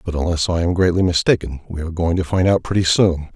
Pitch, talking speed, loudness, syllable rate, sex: 85 Hz, 250 wpm, -18 LUFS, 6.6 syllables/s, male